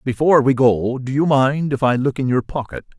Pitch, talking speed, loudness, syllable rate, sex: 135 Hz, 240 wpm, -17 LUFS, 5.4 syllables/s, male